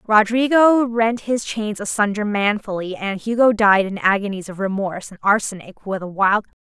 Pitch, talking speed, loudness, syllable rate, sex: 210 Hz, 170 wpm, -19 LUFS, 5.2 syllables/s, female